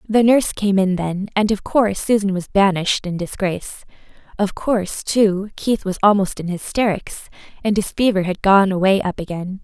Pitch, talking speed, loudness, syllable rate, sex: 195 Hz, 180 wpm, -18 LUFS, 5.1 syllables/s, female